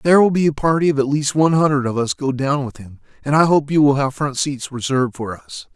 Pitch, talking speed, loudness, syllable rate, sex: 140 Hz, 280 wpm, -18 LUFS, 6.1 syllables/s, male